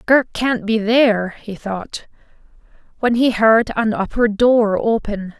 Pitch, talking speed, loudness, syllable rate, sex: 220 Hz, 145 wpm, -17 LUFS, 3.7 syllables/s, female